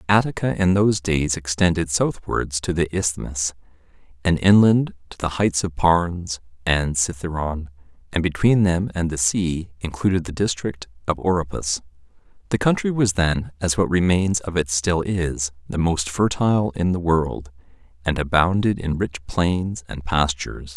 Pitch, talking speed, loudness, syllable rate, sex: 85 Hz, 155 wpm, -21 LUFS, 4.5 syllables/s, male